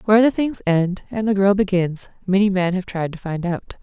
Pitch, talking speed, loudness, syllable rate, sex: 190 Hz, 235 wpm, -20 LUFS, 5.3 syllables/s, female